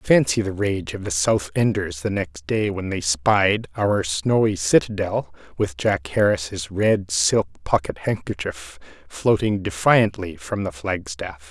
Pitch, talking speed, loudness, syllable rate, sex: 105 Hz, 150 wpm, -22 LUFS, 3.8 syllables/s, male